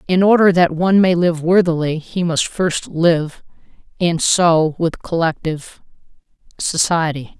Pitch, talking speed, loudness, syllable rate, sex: 170 Hz, 130 wpm, -16 LUFS, 4.3 syllables/s, female